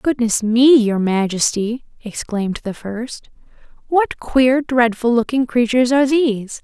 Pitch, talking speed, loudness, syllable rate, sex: 240 Hz, 125 wpm, -17 LUFS, 4.3 syllables/s, female